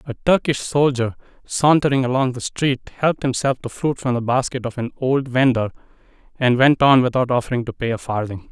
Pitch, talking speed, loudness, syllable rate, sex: 130 Hz, 190 wpm, -19 LUFS, 5.5 syllables/s, male